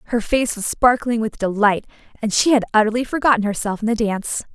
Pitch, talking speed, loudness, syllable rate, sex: 225 Hz, 200 wpm, -19 LUFS, 6.1 syllables/s, female